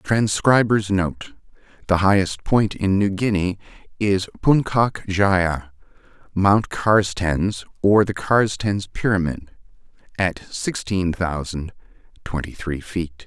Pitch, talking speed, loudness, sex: 95 Hz, 105 wpm, -20 LUFS, male